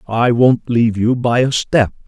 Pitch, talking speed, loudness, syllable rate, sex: 120 Hz, 200 wpm, -15 LUFS, 4.6 syllables/s, male